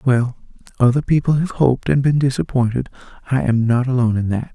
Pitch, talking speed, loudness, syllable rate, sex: 125 Hz, 185 wpm, -18 LUFS, 6.1 syllables/s, male